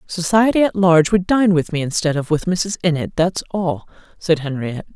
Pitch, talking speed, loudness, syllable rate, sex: 170 Hz, 195 wpm, -18 LUFS, 5.3 syllables/s, female